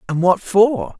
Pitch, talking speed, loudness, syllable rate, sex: 195 Hz, 180 wpm, -16 LUFS, 3.7 syllables/s, male